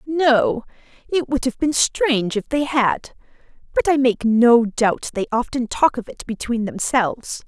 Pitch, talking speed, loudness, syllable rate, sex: 250 Hz, 170 wpm, -19 LUFS, 4.2 syllables/s, female